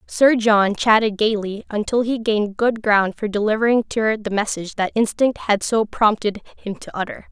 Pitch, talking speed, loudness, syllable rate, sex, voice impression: 215 Hz, 190 wpm, -19 LUFS, 5.1 syllables/s, female, feminine, slightly adult-like, slightly soft, slightly cute, friendly, slightly lively, slightly kind